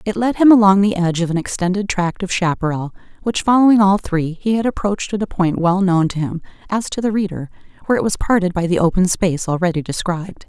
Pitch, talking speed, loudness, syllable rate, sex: 190 Hz, 225 wpm, -17 LUFS, 6.3 syllables/s, female